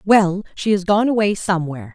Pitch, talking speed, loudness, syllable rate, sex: 190 Hz, 185 wpm, -18 LUFS, 5.7 syllables/s, female